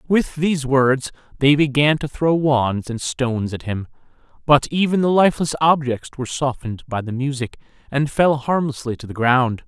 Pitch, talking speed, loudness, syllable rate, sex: 135 Hz, 175 wpm, -19 LUFS, 5.0 syllables/s, male